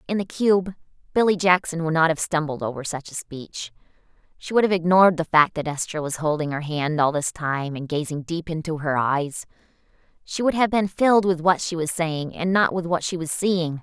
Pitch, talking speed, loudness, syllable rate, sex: 165 Hz, 220 wpm, -22 LUFS, 5.2 syllables/s, female